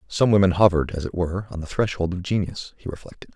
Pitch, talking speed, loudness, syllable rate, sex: 90 Hz, 230 wpm, -22 LUFS, 6.9 syllables/s, male